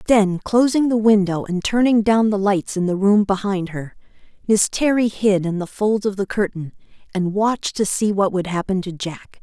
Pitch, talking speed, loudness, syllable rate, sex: 200 Hz, 205 wpm, -19 LUFS, 4.8 syllables/s, female